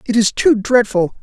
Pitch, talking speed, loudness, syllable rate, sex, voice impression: 220 Hz, 195 wpm, -14 LUFS, 4.6 syllables/s, male, masculine, adult-like, relaxed, powerful, bright, raspy, cool, mature, friendly, wild, lively, intense, slightly light